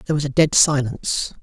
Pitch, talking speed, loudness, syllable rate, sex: 140 Hz, 210 wpm, -18 LUFS, 6.1 syllables/s, male